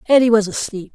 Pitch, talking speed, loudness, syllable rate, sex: 220 Hz, 190 wpm, -17 LUFS, 6.5 syllables/s, female